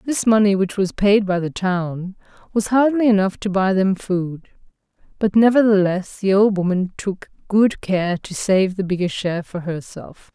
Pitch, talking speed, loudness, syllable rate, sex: 195 Hz, 175 wpm, -19 LUFS, 4.5 syllables/s, female